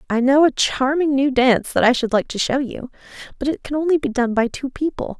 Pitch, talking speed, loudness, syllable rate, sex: 265 Hz, 255 wpm, -19 LUFS, 5.7 syllables/s, female